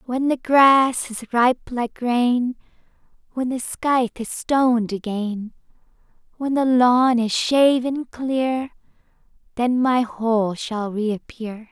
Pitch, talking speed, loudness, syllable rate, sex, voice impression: 245 Hz, 125 wpm, -20 LUFS, 3.3 syllables/s, female, very feminine, young, tensed, slightly powerful, very bright, soft, very clear, slightly fluent, very cute, intellectual, refreshing, very sincere, very calm, very friendly, very reassuring, very unique, very elegant, slightly wild, very sweet, very lively, very kind, very modest, light